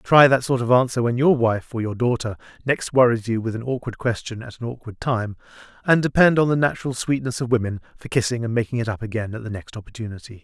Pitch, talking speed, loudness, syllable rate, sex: 120 Hz, 235 wpm, -21 LUFS, 6.3 syllables/s, male